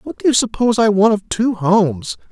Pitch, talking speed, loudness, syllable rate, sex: 200 Hz, 235 wpm, -15 LUFS, 5.5 syllables/s, male